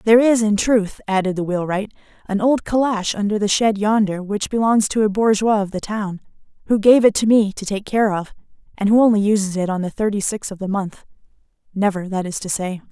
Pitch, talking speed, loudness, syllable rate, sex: 205 Hz, 220 wpm, -18 LUFS, 5.6 syllables/s, female